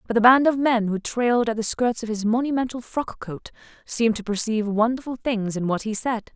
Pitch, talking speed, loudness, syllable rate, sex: 230 Hz, 225 wpm, -22 LUFS, 5.6 syllables/s, female